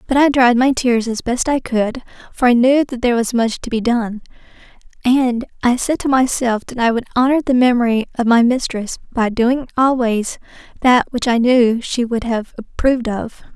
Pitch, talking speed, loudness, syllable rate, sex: 240 Hz, 195 wpm, -16 LUFS, 4.8 syllables/s, female